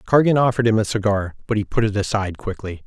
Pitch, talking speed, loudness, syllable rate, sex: 105 Hz, 230 wpm, -20 LUFS, 6.8 syllables/s, male